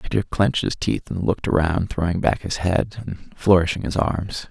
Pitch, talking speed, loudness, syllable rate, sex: 95 Hz, 200 wpm, -22 LUFS, 5.0 syllables/s, male